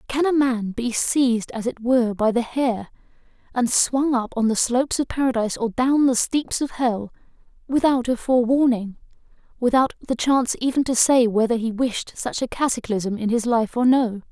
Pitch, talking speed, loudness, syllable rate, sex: 245 Hz, 185 wpm, -21 LUFS, 5.1 syllables/s, female